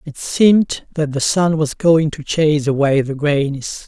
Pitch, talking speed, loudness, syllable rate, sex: 150 Hz, 185 wpm, -16 LUFS, 4.4 syllables/s, male